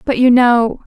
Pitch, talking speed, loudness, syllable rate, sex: 245 Hz, 190 wpm, -12 LUFS, 3.9 syllables/s, female